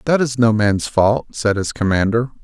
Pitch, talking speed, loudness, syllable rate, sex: 110 Hz, 195 wpm, -17 LUFS, 4.7 syllables/s, male